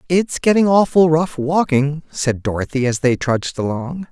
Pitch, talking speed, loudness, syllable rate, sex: 150 Hz, 160 wpm, -17 LUFS, 4.7 syllables/s, male